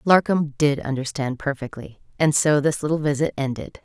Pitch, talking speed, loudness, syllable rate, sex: 145 Hz, 155 wpm, -22 LUFS, 5.1 syllables/s, female